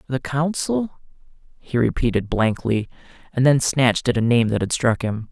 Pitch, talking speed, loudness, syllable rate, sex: 130 Hz, 170 wpm, -20 LUFS, 4.8 syllables/s, male